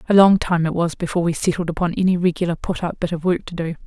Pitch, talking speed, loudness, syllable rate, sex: 175 Hz, 280 wpm, -20 LUFS, 6.9 syllables/s, female